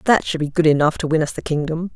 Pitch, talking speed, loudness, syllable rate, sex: 160 Hz, 305 wpm, -19 LUFS, 6.3 syllables/s, female